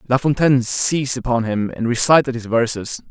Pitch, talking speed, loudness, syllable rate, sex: 125 Hz, 175 wpm, -18 LUFS, 5.5 syllables/s, male